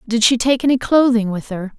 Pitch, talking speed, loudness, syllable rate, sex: 235 Hz, 235 wpm, -16 LUFS, 5.5 syllables/s, female